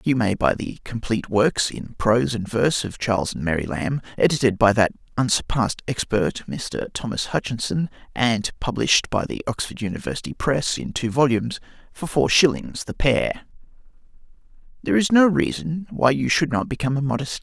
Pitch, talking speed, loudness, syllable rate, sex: 125 Hz, 180 wpm, -22 LUFS, 3.6 syllables/s, male